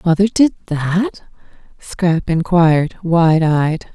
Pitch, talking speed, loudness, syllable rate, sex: 170 Hz, 105 wpm, -15 LUFS, 3.3 syllables/s, female